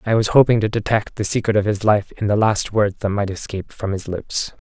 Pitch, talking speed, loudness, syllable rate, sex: 105 Hz, 255 wpm, -19 LUFS, 5.7 syllables/s, male